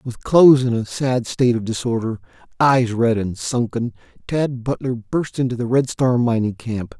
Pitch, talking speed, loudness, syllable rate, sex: 120 Hz, 180 wpm, -19 LUFS, 4.7 syllables/s, male